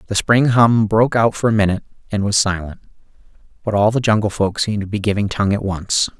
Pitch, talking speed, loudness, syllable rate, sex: 105 Hz, 225 wpm, -17 LUFS, 6.4 syllables/s, male